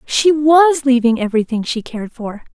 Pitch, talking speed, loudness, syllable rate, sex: 260 Hz, 165 wpm, -14 LUFS, 5.1 syllables/s, female